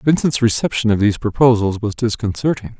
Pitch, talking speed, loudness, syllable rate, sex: 115 Hz, 150 wpm, -17 LUFS, 5.8 syllables/s, male